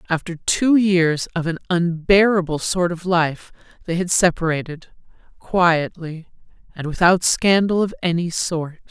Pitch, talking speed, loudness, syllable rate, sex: 175 Hz, 120 wpm, -19 LUFS, 4.2 syllables/s, female